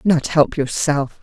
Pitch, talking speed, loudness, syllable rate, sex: 150 Hz, 145 wpm, -18 LUFS, 3.5 syllables/s, female